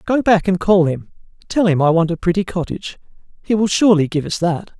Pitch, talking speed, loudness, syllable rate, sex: 180 Hz, 225 wpm, -17 LUFS, 6.0 syllables/s, male